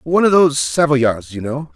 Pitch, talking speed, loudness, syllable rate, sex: 135 Hz, 205 wpm, -15 LUFS, 5.3 syllables/s, male